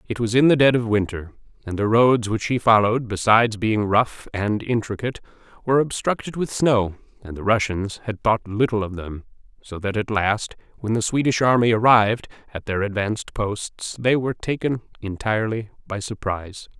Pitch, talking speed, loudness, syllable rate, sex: 110 Hz, 175 wpm, -21 LUFS, 5.3 syllables/s, male